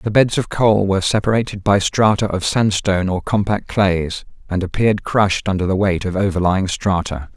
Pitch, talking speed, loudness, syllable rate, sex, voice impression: 100 Hz, 180 wpm, -17 LUFS, 5.2 syllables/s, male, very masculine, very adult-like, middle-aged, very thick, tensed, powerful, slightly dark, hard, slightly muffled, fluent, cool, intellectual, slightly refreshing, very sincere, very calm, mature, friendly, reassuring, slightly unique, slightly elegant, wild, slightly lively, kind, slightly modest